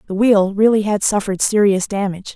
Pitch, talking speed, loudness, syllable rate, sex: 205 Hz, 180 wpm, -16 LUFS, 6.0 syllables/s, female